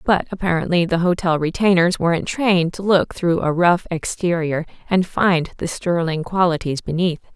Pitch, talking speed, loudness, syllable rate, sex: 175 Hz, 155 wpm, -19 LUFS, 4.9 syllables/s, female